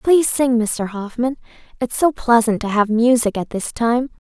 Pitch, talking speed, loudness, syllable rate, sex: 240 Hz, 185 wpm, -18 LUFS, 4.7 syllables/s, female